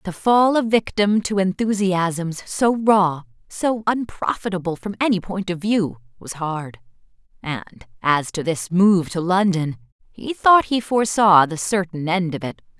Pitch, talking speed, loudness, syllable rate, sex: 185 Hz, 155 wpm, -20 LUFS, 4.1 syllables/s, female